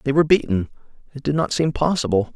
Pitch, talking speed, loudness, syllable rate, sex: 135 Hz, 205 wpm, -20 LUFS, 6.7 syllables/s, male